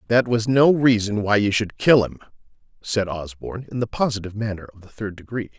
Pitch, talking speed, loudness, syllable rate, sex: 110 Hz, 205 wpm, -21 LUFS, 5.9 syllables/s, male